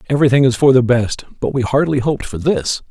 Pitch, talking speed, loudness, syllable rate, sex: 130 Hz, 225 wpm, -15 LUFS, 6.3 syllables/s, male